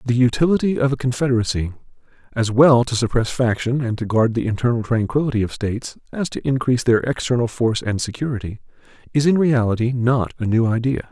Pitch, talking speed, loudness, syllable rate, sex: 120 Hz, 180 wpm, -19 LUFS, 6.1 syllables/s, male